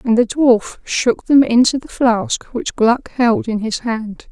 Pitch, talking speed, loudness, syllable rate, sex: 240 Hz, 195 wpm, -16 LUFS, 3.7 syllables/s, female